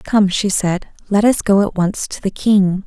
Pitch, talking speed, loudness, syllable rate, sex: 195 Hz, 230 wpm, -16 LUFS, 4.1 syllables/s, female